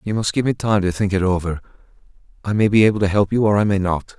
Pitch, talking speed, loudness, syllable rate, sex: 100 Hz, 285 wpm, -18 LUFS, 6.7 syllables/s, male